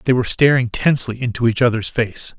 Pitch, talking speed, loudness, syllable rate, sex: 120 Hz, 200 wpm, -17 LUFS, 6.2 syllables/s, male